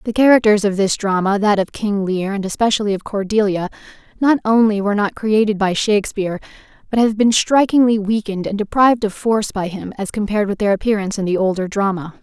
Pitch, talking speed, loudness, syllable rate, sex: 205 Hz, 195 wpm, -17 LUFS, 6.2 syllables/s, female